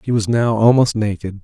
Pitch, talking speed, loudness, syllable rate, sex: 110 Hz, 210 wpm, -16 LUFS, 5.3 syllables/s, male